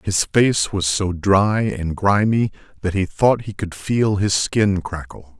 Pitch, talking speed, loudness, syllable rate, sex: 100 Hz, 180 wpm, -19 LUFS, 3.6 syllables/s, male